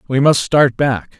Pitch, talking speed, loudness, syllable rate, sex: 135 Hz, 200 wpm, -14 LUFS, 4.1 syllables/s, male